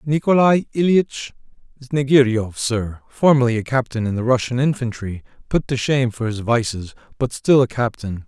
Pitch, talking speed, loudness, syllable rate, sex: 125 Hz, 150 wpm, -19 LUFS, 5.1 syllables/s, male